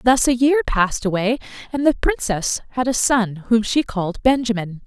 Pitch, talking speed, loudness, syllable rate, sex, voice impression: 235 Hz, 185 wpm, -19 LUFS, 5.1 syllables/s, female, very feminine, slightly young, adult-like, very thin, tensed, slightly powerful, very bright, hard, very clear, fluent, slightly cute, slightly cool, very intellectual, refreshing, sincere, calm, slightly mature, friendly, reassuring, very unique, elegant, slightly sweet, lively, kind, slightly modest